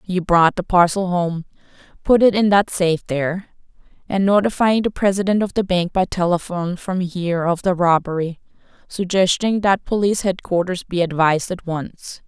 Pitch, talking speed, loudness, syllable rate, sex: 180 Hz, 155 wpm, -18 LUFS, 5.1 syllables/s, female